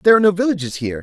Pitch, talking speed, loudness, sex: 180 Hz, 295 wpm, -17 LUFS, male